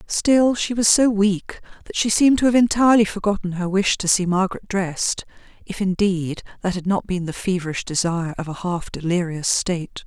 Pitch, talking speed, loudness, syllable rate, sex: 195 Hz, 185 wpm, -20 LUFS, 5.4 syllables/s, female